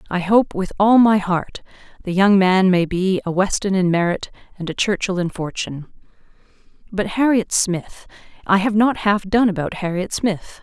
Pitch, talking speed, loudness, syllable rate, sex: 190 Hz, 165 wpm, -18 LUFS, 4.7 syllables/s, female